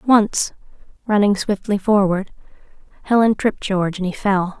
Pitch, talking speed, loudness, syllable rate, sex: 200 Hz, 130 wpm, -18 LUFS, 4.8 syllables/s, female